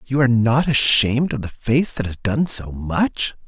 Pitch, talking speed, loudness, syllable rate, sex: 125 Hz, 205 wpm, -19 LUFS, 4.6 syllables/s, male